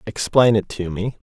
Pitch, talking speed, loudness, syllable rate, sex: 105 Hz, 190 wpm, -19 LUFS, 4.7 syllables/s, male